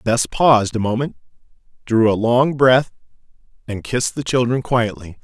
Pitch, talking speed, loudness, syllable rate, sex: 120 Hz, 150 wpm, -17 LUFS, 4.9 syllables/s, male